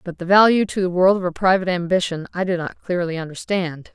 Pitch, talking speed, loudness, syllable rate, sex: 180 Hz, 230 wpm, -19 LUFS, 6.1 syllables/s, female